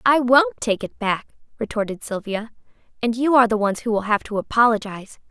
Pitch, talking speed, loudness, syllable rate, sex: 220 Hz, 190 wpm, -20 LUFS, 5.8 syllables/s, female